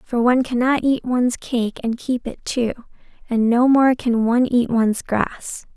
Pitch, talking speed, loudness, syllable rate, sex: 240 Hz, 190 wpm, -19 LUFS, 4.5 syllables/s, female